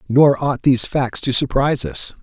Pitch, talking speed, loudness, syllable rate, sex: 130 Hz, 190 wpm, -17 LUFS, 5.0 syllables/s, male